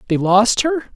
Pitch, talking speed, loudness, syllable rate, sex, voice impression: 230 Hz, 190 wpm, -15 LUFS, 4.6 syllables/s, male, masculine, slightly young, very adult-like, thick, slightly tensed, slightly powerful, slightly dark, soft, slightly muffled, fluent, cool, intellectual, slightly refreshing, very sincere, very calm, mature, friendly, very reassuring, unique, elegant, slightly wild, sweet, slightly lively, kind, modest, slightly light